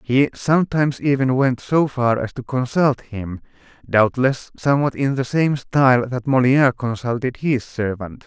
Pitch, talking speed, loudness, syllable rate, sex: 130 Hz, 150 wpm, -19 LUFS, 4.6 syllables/s, male